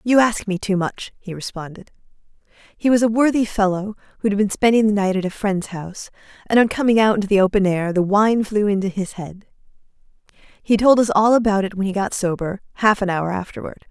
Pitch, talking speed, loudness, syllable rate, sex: 200 Hz, 215 wpm, -19 LUFS, 5.7 syllables/s, female